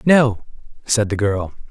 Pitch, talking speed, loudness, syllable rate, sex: 115 Hz, 140 wpm, -18 LUFS, 3.9 syllables/s, male